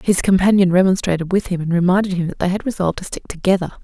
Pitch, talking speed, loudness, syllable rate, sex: 185 Hz, 235 wpm, -17 LUFS, 7.0 syllables/s, female